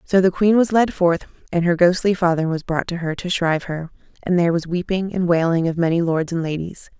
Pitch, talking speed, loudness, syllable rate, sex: 175 Hz, 240 wpm, -19 LUFS, 5.7 syllables/s, female